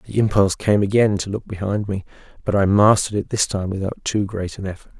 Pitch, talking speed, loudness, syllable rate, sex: 100 Hz, 230 wpm, -20 LUFS, 6.2 syllables/s, male